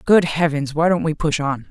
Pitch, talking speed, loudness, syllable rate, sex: 155 Hz, 245 wpm, -19 LUFS, 5.0 syllables/s, female